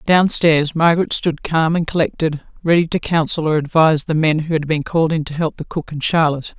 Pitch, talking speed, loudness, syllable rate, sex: 160 Hz, 230 wpm, -17 LUFS, 5.7 syllables/s, female